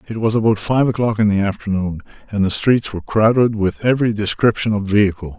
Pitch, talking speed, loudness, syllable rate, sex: 105 Hz, 200 wpm, -17 LUFS, 6.1 syllables/s, male